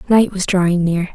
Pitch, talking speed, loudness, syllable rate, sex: 185 Hz, 210 wpm, -16 LUFS, 5.3 syllables/s, female